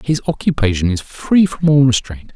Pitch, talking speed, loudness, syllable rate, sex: 130 Hz, 180 wpm, -15 LUFS, 5.0 syllables/s, male